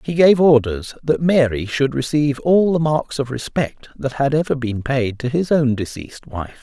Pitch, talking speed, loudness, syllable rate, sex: 135 Hz, 200 wpm, -18 LUFS, 4.7 syllables/s, male